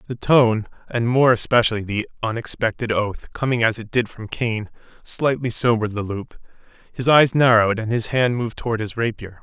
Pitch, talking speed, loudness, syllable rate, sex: 115 Hz, 180 wpm, -20 LUFS, 5.3 syllables/s, male